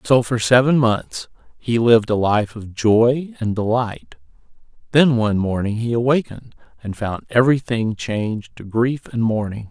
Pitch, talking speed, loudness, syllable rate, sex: 115 Hz, 155 wpm, -19 LUFS, 4.7 syllables/s, male